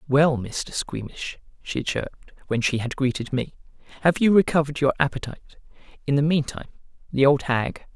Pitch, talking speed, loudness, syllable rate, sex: 140 Hz, 160 wpm, -23 LUFS, 5.7 syllables/s, male